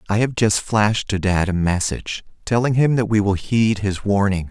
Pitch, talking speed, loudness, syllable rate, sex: 105 Hz, 215 wpm, -19 LUFS, 5.1 syllables/s, male